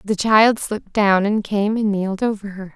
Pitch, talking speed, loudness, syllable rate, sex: 205 Hz, 220 wpm, -18 LUFS, 4.9 syllables/s, female